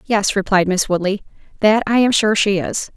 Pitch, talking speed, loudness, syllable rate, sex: 205 Hz, 205 wpm, -16 LUFS, 5.0 syllables/s, female